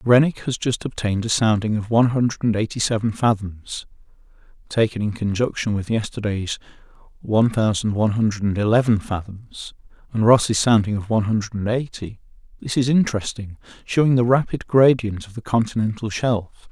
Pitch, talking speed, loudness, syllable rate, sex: 110 Hz, 145 wpm, -20 LUFS, 5.3 syllables/s, male